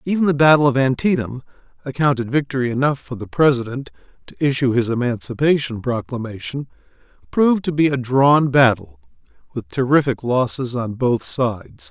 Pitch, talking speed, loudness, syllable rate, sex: 135 Hz, 140 wpm, -18 LUFS, 5.4 syllables/s, male